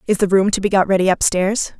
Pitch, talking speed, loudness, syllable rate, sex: 195 Hz, 270 wpm, -16 LUFS, 6.3 syllables/s, female